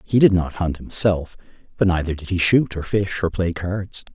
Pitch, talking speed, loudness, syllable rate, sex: 90 Hz, 205 wpm, -20 LUFS, 4.8 syllables/s, male